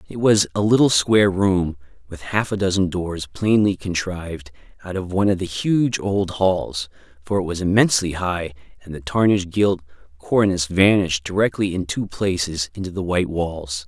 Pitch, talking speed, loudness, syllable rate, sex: 90 Hz, 175 wpm, -20 LUFS, 5.1 syllables/s, male